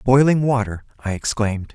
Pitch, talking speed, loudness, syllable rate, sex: 115 Hz, 140 wpm, -20 LUFS, 5.3 syllables/s, male